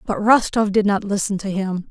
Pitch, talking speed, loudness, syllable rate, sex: 200 Hz, 220 wpm, -19 LUFS, 5.0 syllables/s, female